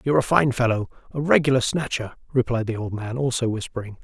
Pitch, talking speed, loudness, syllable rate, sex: 120 Hz, 195 wpm, -23 LUFS, 6.2 syllables/s, male